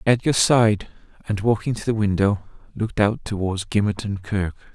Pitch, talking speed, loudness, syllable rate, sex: 105 Hz, 150 wpm, -22 LUFS, 5.3 syllables/s, male